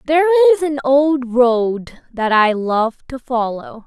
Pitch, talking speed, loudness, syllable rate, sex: 265 Hz, 155 wpm, -16 LUFS, 3.6 syllables/s, female